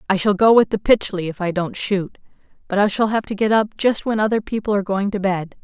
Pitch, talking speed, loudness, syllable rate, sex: 200 Hz, 265 wpm, -19 LUFS, 6.0 syllables/s, female